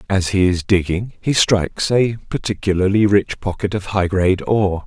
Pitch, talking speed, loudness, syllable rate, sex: 100 Hz, 175 wpm, -18 LUFS, 5.1 syllables/s, male